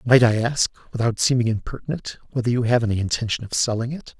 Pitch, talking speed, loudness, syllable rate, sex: 115 Hz, 200 wpm, -22 LUFS, 6.4 syllables/s, male